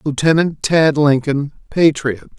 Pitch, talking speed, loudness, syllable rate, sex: 145 Hz, 100 wpm, -15 LUFS, 4.0 syllables/s, male